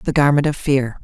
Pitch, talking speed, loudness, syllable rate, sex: 140 Hz, 230 wpm, -17 LUFS, 5.6 syllables/s, female